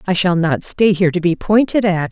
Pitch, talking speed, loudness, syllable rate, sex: 185 Hz, 255 wpm, -15 LUFS, 5.5 syllables/s, female